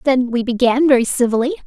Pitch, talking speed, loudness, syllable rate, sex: 250 Hz, 145 wpm, -16 LUFS, 6.3 syllables/s, female